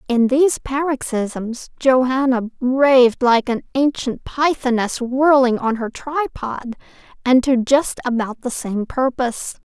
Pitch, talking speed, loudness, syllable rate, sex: 255 Hz, 125 wpm, -18 LUFS, 3.9 syllables/s, female